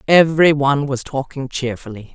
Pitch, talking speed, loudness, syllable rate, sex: 140 Hz, 140 wpm, -17 LUFS, 5.5 syllables/s, female